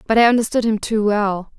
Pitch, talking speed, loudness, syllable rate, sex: 215 Hz, 225 wpm, -17 LUFS, 5.7 syllables/s, female